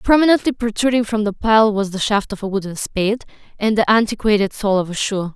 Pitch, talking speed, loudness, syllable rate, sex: 210 Hz, 215 wpm, -18 LUFS, 5.9 syllables/s, female